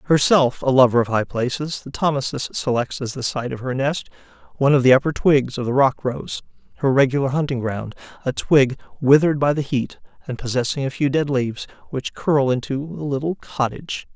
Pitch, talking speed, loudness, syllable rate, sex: 135 Hz, 195 wpm, -20 LUFS, 5.4 syllables/s, male